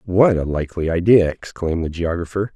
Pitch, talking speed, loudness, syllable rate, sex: 90 Hz, 165 wpm, -19 LUFS, 5.8 syllables/s, male